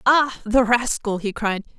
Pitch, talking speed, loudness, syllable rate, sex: 230 Hz, 170 wpm, -21 LUFS, 4.0 syllables/s, female